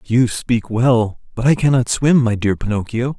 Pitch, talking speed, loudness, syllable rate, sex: 120 Hz, 190 wpm, -17 LUFS, 4.4 syllables/s, male